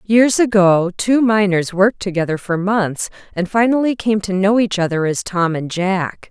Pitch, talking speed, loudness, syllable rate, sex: 195 Hz, 180 wpm, -16 LUFS, 4.6 syllables/s, female